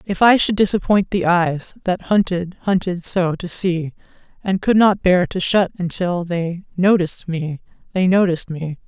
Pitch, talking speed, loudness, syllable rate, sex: 180 Hz, 170 wpm, -18 LUFS, 4.5 syllables/s, female